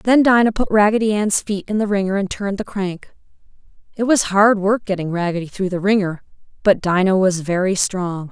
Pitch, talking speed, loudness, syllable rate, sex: 195 Hz, 195 wpm, -18 LUFS, 5.4 syllables/s, female